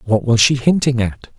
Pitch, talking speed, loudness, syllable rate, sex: 125 Hz, 215 wpm, -15 LUFS, 5.0 syllables/s, male